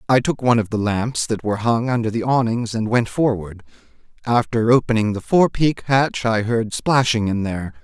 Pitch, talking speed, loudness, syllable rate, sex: 115 Hz, 190 wpm, -19 LUFS, 5.3 syllables/s, male